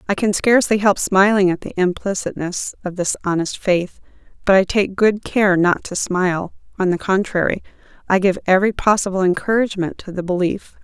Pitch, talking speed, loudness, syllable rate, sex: 190 Hz, 170 wpm, -18 LUFS, 5.4 syllables/s, female